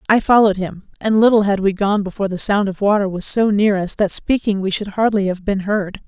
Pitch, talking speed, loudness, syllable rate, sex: 200 Hz, 245 wpm, -17 LUFS, 5.8 syllables/s, female